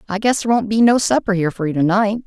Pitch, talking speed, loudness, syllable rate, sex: 210 Hz, 315 wpm, -17 LUFS, 7.2 syllables/s, female